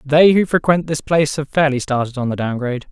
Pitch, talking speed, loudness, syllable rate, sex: 145 Hz, 245 wpm, -17 LUFS, 6.1 syllables/s, male